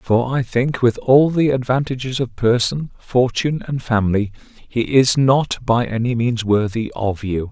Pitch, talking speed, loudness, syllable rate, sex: 120 Hz, 170 wpm, -18 LUFS, 4.4 syllables/s, male